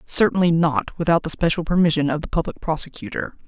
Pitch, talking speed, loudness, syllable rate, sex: 160 Hz, 175 wpm, -21 LUFS, 6.1 syllables/s, female